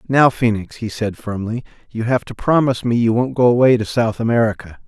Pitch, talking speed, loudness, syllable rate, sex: 115 Hz, 210 wpm, -17 LUFS, 5.6 syllables/s, male